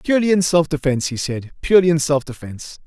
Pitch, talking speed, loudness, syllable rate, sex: 155 Hz, 210 wpm, -18 LUFS, 7.0 syllables/s, male